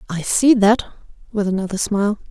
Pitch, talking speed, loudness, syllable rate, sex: 205 Hz, 155 wpm, -18 LUFS, 5.9 syllables/s, female